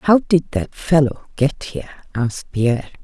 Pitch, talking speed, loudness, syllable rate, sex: 140 Hz, 160 wpm, -19 LUFS, 5.1 syllables/s, female